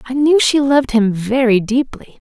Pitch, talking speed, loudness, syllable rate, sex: 255 Hz, 180 wpm, -14 LUFS, 4.9 syllables/s, female